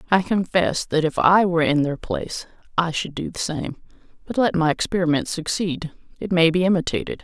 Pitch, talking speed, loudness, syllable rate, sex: 170 Hz, 190 wpm, -21 LUFS, 5.5 syllables/s, female